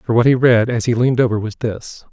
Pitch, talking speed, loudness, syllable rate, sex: 120 Hz, 285 wpm, -16 LUFS, 6.1 syllables/s, male